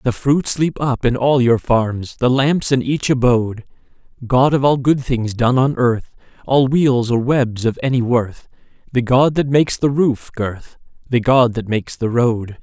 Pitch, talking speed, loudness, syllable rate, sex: 125 Hz, 195 wpm, -17 LUFS, 4.3 syllables/s, male